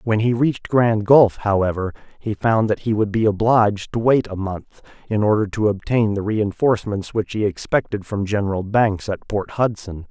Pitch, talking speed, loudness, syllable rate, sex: 105 Hz, 190 wpm, -19 LUFS, 5.0 syllables/s, male